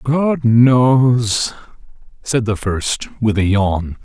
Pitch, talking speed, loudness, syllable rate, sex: 115 Hz, 120 wpm, -15 LUFS, 2.6 syllables/s, male